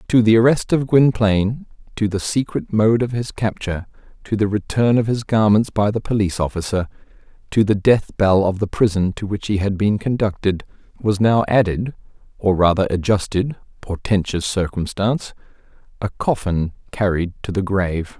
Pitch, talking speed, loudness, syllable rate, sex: 105 Hz, 155 wpm, -19 LUFS, 5.1 syllables/s, male